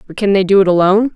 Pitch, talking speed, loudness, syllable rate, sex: 195 Hz, 310 wpm, -12 LUFS, 7.9 syllables/s, female